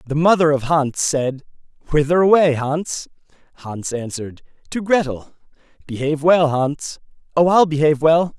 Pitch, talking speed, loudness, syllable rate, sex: 150 Hz, 135 wpm, -18 LUFS, 4.8 syllables/s, male